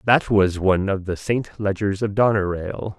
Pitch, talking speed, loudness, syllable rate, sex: 100 Hz, 180 wpm, -21 LUFS, 5.0 syllables/s, male